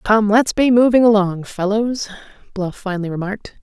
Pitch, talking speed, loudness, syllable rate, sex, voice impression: 210 Hz, 150 wpm, -17 LUFS, 5.2 syllables/s, female, feminine, adult-like, slightly soft, fluent, calm, reassuring, slightly kind